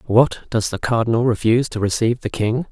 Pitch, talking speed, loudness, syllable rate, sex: 115 Hz, 200 wpm, -19 LUFS, 6.2 syllables/s, male